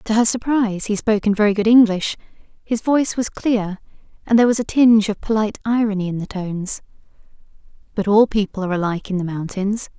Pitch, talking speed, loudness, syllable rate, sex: 210 Hz, 190 wpm, -18 LUFS, 6.2 syllables/s, female